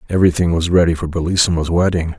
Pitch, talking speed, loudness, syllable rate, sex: 85 Hz, 165 wpm, -16 LUFS, 7.0 syllables/s, male